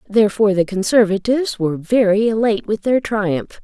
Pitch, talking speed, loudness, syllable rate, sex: 210 Hz, 150 wpm, -17 LUFS, 5.8 syllables/s, female